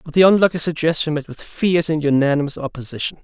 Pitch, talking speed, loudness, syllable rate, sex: 155 Hz, 185 wpm, -18 LUFS, 6.8 syllables/s, male